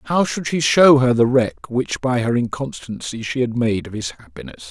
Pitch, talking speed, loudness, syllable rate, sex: 125 Hz, 215 wpm, -19 LUFS, 4.7 syllables/s, male